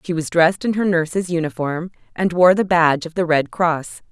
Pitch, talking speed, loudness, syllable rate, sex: 170 Hz, 220 wpm, -18 LUFS, 5.5 syllables/s, female